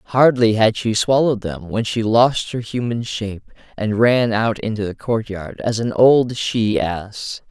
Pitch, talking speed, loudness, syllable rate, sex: 110 Hz, 175 wpm, -18 LUFS, 4.1 syllables/s, male